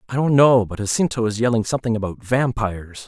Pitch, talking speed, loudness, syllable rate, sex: 115 Hz, 195 wpm, -19 LUFS, 6.2 syllables/s, male